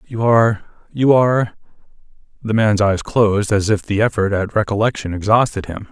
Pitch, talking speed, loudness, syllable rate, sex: 105 Hz, 150 wpm, -17 LUFS, 4.5 syllables/s, male